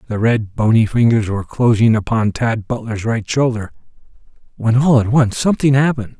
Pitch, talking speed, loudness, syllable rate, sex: 115 Hz, 165 wpm, -16 LUFS, 5.4 syllables/s, male